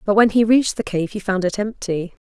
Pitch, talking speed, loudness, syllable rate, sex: 205 Hz, 265 wpm, -19 LUFS, 5.8 syllables/s, female